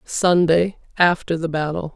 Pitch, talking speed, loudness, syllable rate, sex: 170 Hz, 125 wpm, -19 LUFS, 4.1 syllables/s, female